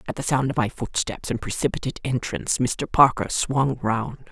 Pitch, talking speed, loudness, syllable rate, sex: 125 Hz, 180 wpm, -23 LUFS, 5.1 syllables/s, female